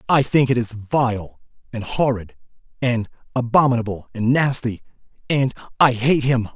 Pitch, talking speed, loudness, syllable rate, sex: 125 Hz, 135 wpm, -20 LUFS, 4.6 syllables/s, male